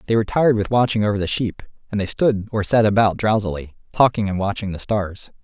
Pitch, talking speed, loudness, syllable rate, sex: 105 Hz, 220 wpm, -20 LUFS, 6.1 syllables/s, male